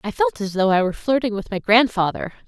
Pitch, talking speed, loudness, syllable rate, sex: 220 Hz, 240 wpm, -20 LUFS, 6.2 syllables/s, female